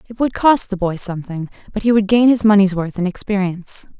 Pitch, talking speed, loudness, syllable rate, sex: 200 Hz, 225 wpm, -17 LUFS, 6.0 syllables/s, female